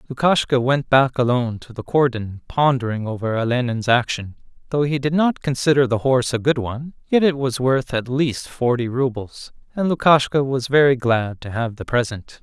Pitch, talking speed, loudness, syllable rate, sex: 130 Hz, 185 wpm, -20 LUFS, 5.1 syllables/s, male